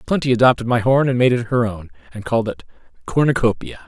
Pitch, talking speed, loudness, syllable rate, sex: 120 Hz, 200 wpm, -18 LUFS, 6.5 syllables/s, male